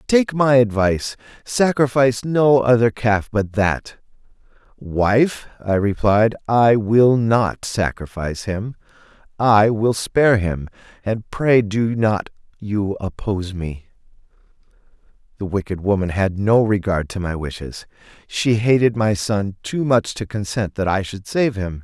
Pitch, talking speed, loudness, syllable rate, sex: 110 Hz, 135 wpm, -19 LUFS, 4.0 syllables/s, male